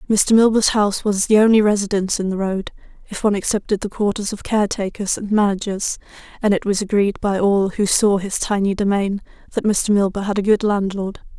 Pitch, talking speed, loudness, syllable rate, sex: 200 Hz, 195 wpm, -18 LUFS, 5.8 syllables/s, female